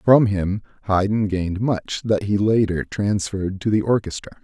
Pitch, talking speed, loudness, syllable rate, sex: 100 Hz, 160 wpm, -21 LUFS, 4.5 syllables/s, male